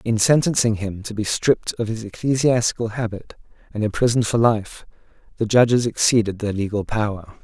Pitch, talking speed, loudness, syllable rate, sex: 110 Hz, 160 wpm, -20 LUFS, 5.6 syllables/s, male